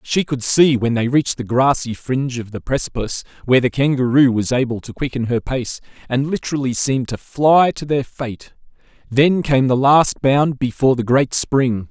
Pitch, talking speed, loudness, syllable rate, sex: 130 Hz, 190 wpm, -17 LUFS, 5.1 syllables/s, male